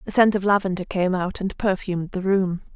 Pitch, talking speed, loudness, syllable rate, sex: 190 Hz, 220 wpm, -22 LUFS, 5.6 syllables/s, female